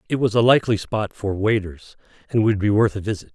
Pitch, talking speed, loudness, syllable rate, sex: 105 Hz, 235 wpm, -20 LUFS, 6.1 syllables/s, male